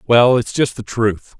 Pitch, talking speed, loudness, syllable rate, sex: 115 Hz, 215 wpm, -16 LUFS, 4.2 syllables/s, male